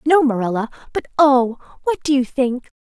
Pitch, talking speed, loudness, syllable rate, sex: 265 Hz, 165 wpm, -18 LUFS, 5.0 syllables/s, female